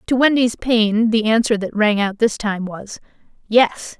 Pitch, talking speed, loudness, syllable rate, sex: 220 Hz, 180 wpm, -17 LUFS, 4.2 syllables/s, female